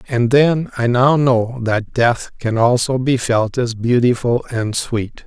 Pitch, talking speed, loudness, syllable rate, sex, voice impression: 120 Hz, 170 wpm, -16 LUFS, 3.6 syllables/s, male, very masculine, middle-aged, slightly thick, slightly muffled, sincere, friendly, slightly kind